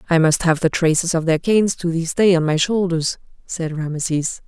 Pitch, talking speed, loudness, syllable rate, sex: 165 Hz, 215 wpm, -18 LUFS, 5.3 syllables/s, female